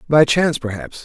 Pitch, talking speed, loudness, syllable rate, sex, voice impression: 140 Hz, 175 wpm, -17 LUFS, 5.9 syllables/s, male, masculine, middle-aged, weak, soft, muffled, slightly halting, slightly raspy, sincere, calm, mature, wild, slightly modest